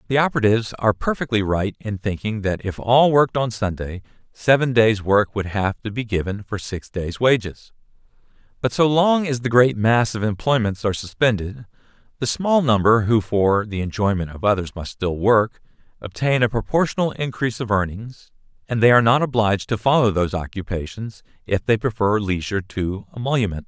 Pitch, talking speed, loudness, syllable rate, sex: 110 Hz, 175 wpm, -20 LUFS, 5.4 syllables/s, male